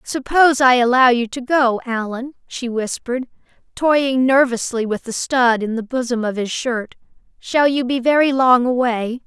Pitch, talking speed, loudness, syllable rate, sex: 250 Hz, 170 wpm, -17 LUFS, 4.6 syllables/s, female